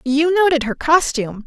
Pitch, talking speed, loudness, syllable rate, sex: 290 Hz, 165 wpm, -16 LUFS, 5.1 syllables/s, female